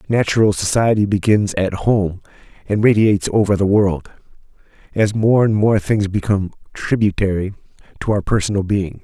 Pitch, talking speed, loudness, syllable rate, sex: 100 Hz, 140 wpm, -17 LUFS, 5.2 syllables/s, male